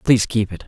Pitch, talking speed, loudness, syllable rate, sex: 105 Hz, 265 wpm, -19 LUFS, 7.0 syllables/s, male